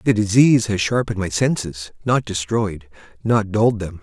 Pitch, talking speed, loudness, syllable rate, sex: 105 Hz, 135 wpm, -19 LUFS, 5.1 syllables/s, male